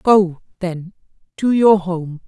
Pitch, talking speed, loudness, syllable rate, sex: 185 Hz, 130 wpm, -17 LUFS, 3.3 syllables/s, female